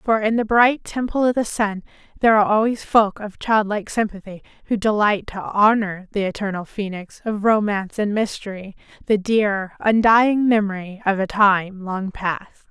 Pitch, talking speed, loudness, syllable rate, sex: 210 Hz, 160 wpm, -20 LUFS, 4.9 syllables/s, female